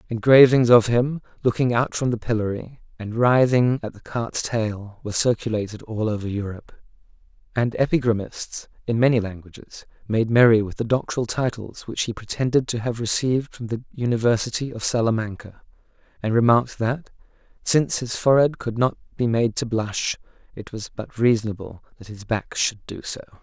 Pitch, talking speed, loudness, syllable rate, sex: 115 Hz, 160 wpm, -22 LUFS, 5.5 syllables/s, male